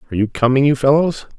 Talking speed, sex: 215 wpm, male